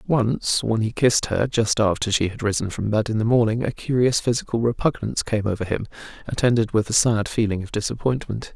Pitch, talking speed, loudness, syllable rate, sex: 110 Hz, 205 wpm, -22 LUFS, 5.8 syllables/s, male